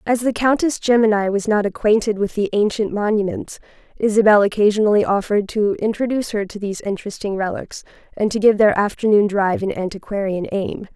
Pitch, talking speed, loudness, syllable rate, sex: 210 Hz, 165 wpm, -18 LUFS, 6.0 syllables/s, female